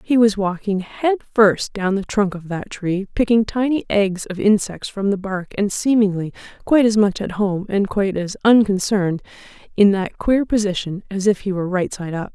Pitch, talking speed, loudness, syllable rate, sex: 200 Hz, 200 wpm, -19 LUFS, 5.0 syllables/s, female